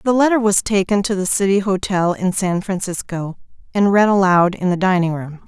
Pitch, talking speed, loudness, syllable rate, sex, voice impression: 190 Hz, 195 wpm, -17 LUFS, 5.3 syllables/s, female, very feminine, very adult-like, slightly clear, intellectual